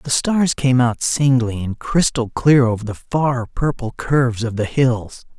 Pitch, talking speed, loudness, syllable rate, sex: 125 Hz, 180 wpm, -18 LUFS, 4.1 syllables/s, male